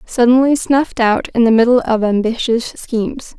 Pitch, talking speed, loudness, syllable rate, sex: 235 Hz, 160 wpm, -14 LUFS, 4.9 syllables/s, female